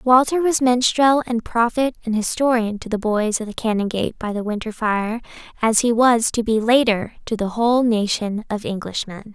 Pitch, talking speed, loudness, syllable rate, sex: 225 Hz, 185 wpm, -19 LUFS, 5.0 syllables/s, female